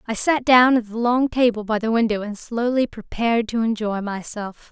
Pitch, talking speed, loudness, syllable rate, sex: 225 Hz, 205 wpm, -20 LUFS, 5.0 syllables/s, female